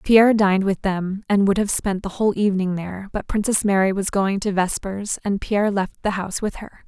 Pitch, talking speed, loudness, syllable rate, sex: 200 Hz, 225 wpm, -21 LUFS, 5.7 syllables/s, female